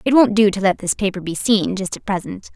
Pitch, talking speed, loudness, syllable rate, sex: 195 Hz, 280 wpm, -18 LUFS, 5.7 syllables/s, female